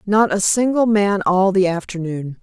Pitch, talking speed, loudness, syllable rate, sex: 195 Hz, 175 wpm, -17 LUFS, 4.4 syllables/s, female